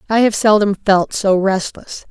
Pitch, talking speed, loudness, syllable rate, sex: 200 Hz, 170 wpm, -15 LUFS, 4.2 syllables/s, female